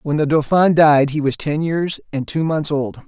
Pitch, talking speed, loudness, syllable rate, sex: 150 Hz, 235 wpm, -17 LUFS, 4.5 syllables/s, male